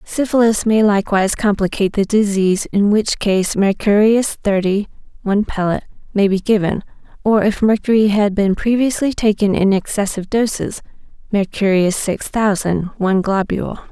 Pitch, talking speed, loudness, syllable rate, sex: 205 Hz, 135 wpm, -16 LUFS, 5.2 syllables/s, female